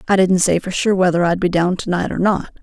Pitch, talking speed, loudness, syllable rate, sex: 180 Hz, 275 wpm, -17 LUFS, 5.9 syllables/s, female